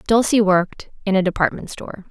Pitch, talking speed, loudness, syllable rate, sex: 195 Hz, 170 wpm, -18 LUFS, 6.1 syllables/s, female